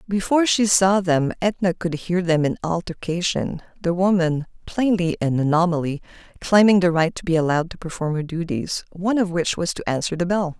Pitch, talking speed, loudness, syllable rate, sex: 175 Hz, 175 wpm, -21 LUFS, 5.4 syllables/s, female